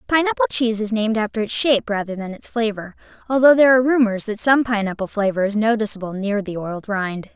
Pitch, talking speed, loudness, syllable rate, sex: 220 Hz, 205 wpm, -19 LUFS, 6.5 syllables/s, female